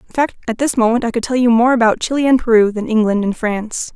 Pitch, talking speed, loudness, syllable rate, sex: 230 Hz, 275 wpm, -15 LUFS, 6.9 syllables/s, female